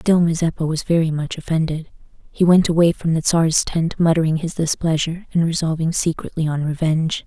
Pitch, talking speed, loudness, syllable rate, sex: 165 Hz, 175 wpm, -19 LUFS, 5.6 syllables/s, female